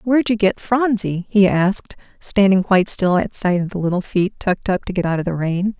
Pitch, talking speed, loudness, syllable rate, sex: 195 Hz, 240 wpm, -18 LUFS, 5.5 syllables/s, female